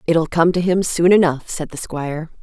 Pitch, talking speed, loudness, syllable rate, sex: 165 Hz, 225 wpm, -18 LUFS, 5.0 syllables/s, female